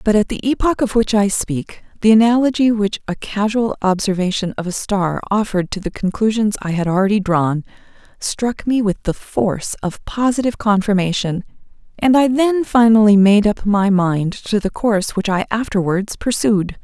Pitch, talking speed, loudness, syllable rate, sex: 205 Hz, 170 wpm, -17 LUFS, 5.0 syllables/s, female